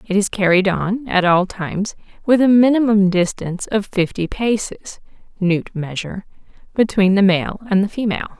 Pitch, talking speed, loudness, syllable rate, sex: 200 Hz, 155 wpm, -17 LUFS, 4.9 syllables/s, female